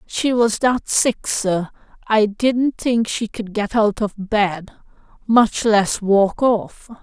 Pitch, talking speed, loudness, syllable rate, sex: 215 Hz, 155 wpm, -18 LUFS, 3.0 syllables/s, female